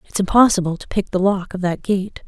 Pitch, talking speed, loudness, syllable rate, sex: 190 Hz, 235 wpm, -18 LUFS, 5.7 syllables/s, female